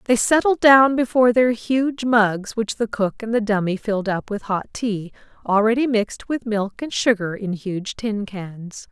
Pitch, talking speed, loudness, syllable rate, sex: 220 Hz, 190 wpm, -20 LUFS, 4.4 syllables/s, female